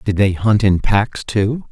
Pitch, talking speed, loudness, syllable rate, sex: 105 Hz, 210 wpm, -16 LUFS, 3.8 syllables/s, male